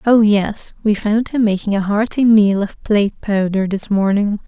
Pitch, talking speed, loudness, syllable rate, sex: 210 Hz, 175 wpm, -16 LUFS, 4.6 syllables/s, female